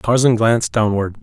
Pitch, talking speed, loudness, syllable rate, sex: 110 Hz, 145 wpm, -16 LUFS, 5.2 syllables/s, male